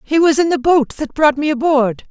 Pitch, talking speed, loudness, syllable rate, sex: 290 Hz, 255 wpm, -15 LUFS, 5.1 syllables/s, female